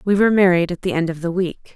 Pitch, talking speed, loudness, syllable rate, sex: 180 Hz, 310 wpm, -18 LUFS, 6.7 syllables/s, female